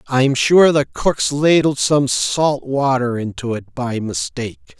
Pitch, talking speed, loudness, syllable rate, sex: 135 Hz, 150 wpm, -17 LUFS, 3.7 syllables/s, male